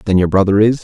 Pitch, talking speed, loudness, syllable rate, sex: 100 Hz, 285 wpm, -13 LUFS, 7.3 syllables/s, male